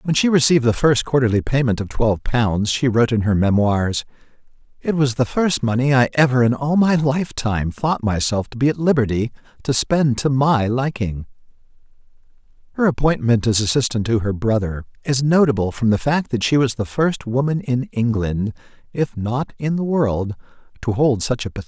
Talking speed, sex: 195 wpm, male